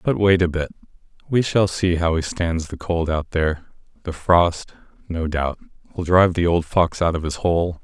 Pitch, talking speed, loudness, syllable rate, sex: 85 Hz, 205 wpm, -20 LUFS, 4.8 syllables/s, male